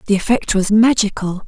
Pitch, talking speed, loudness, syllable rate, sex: 210 Hz, 165 wpm, -15 LUFS, 5.6 syllables/s, female